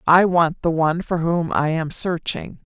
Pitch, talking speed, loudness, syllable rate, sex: 165 Hz, 200 wpm, -20 LUFS, 4.4 syllables/s, female